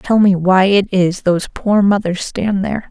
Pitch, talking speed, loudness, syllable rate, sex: 195 Hz, 205 wpm, -14 LUFS, 4.8 syllables/s, female